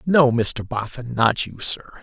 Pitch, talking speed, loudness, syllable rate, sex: 125 Hz, 180 wpm, -21 LUFS, 3.8 syllables/s, male